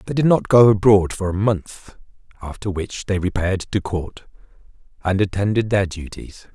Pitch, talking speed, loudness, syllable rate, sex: 100 Hz, 165 wpm, -19 LUFS, 4.9 syllables/s, male